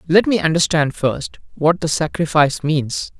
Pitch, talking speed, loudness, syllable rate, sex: 160 Hz, 150 wpm, -18 LUFS, 4.6 syllables/s, male